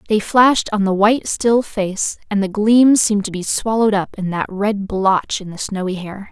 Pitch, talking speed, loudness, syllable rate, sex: 205 Hz, 220 wpm, -17 LUFS, 4.9 syllables/s, female